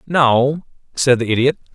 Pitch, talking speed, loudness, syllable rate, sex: 130 Hz, 140 wpm, -16 LUFS, 4.4 syllables/s, male